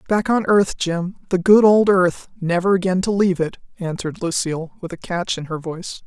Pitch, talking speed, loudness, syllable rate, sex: 180 Hz, 210 wpm, -19 LUFS, 5.5 syllables/s, female